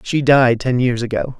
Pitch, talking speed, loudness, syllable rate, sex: 125 Hz, 215 wpm, -16 LUFS, 4.7 syllables/s, male